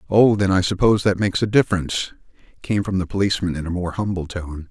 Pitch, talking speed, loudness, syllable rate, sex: 95 Hz, 215 wpm, -20 LUFS, 6.7 syllables/s, male